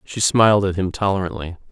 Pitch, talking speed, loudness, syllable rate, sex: 95 Hz, 175 wpm, -18 LUFS, 6.0 syllables/s, male